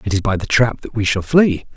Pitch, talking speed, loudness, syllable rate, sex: 110 Hz, 305 wpm, -17 LUFS, 5.6 syllables/s, male